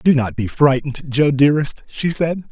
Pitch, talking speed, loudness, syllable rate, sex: 140 Hz, 190 wpm, -17 LUFS, 5.1 syllables/s, male